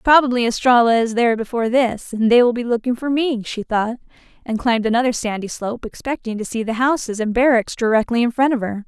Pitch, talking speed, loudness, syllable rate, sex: 235 Hz, 215 wpm, -18 LUFS, 6.2 syllables/s, female